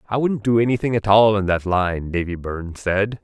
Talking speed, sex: 225 wpm, male